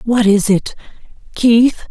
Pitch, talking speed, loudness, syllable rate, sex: 225 Hz, 95 wpm, -13 LUFS, 3.8 syllables/s, female